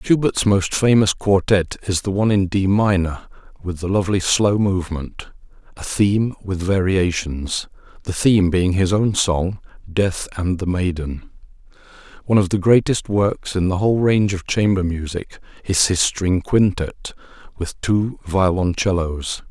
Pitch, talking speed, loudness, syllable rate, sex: 95 Hz, 150 wpm, -19 LUFS, 4.5 syllables/s, male